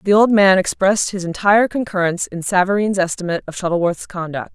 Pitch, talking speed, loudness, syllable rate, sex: 190 Hz, 170 wpm, -17 LUFS, 6.3 syllables/s, female